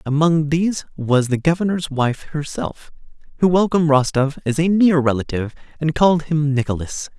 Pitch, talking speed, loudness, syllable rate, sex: 150 Hz, 150 wpm, -18 LUFS, 5.2 syllables/s, male